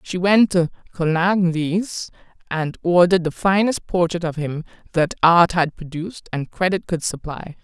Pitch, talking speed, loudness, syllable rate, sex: 170 Hz, 150 wpm, -20 LUFS, 4.5 syllables/s, female